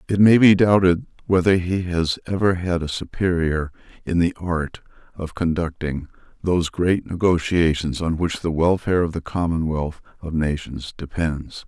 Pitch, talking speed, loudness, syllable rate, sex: 85 Hz, 150 wpm, -21 LUFS, 4.7 syllables/s, male